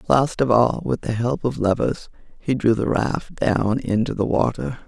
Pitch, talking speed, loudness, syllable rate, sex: 120 Hz, 195 wpm, -21 LUFS, 4.4 syllables/s, female